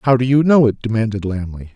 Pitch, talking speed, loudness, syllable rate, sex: 115 Hz, 240 wpm, -16 LUFS, 6.7 syllables/s, male